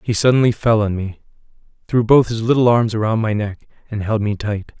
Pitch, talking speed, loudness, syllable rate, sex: 110 Hz, 215 wpm, -17 LUFS, 5.3 syllables/s, male